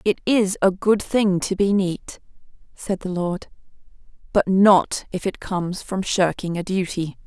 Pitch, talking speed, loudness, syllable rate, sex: 190 Hz, 165 wpm, -21 LUFS, 4.1 syllables/s, female